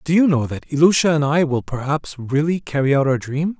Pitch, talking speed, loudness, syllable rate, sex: 150 Hz, 235 wpm, -19 LUFS, 5.6 syllables/s, male